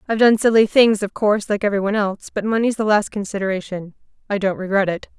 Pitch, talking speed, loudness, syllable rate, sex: 205 Hz, 210 wpm, -18 LUFS, 6.8 syllables/s, female